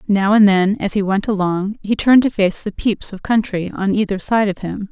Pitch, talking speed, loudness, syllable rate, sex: 200 Hz, 245 wpm, -17 LUFS, 5.2 syllables/s, female